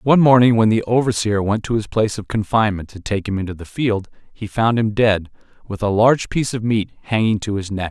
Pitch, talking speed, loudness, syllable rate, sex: 110 Hz, 235 wpm, -18 LUFS, 6.0 syllables/s, male